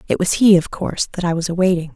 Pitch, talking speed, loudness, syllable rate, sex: 175 Hz, 275 wpm, -17 LUFS, 7.0 syllables/s, female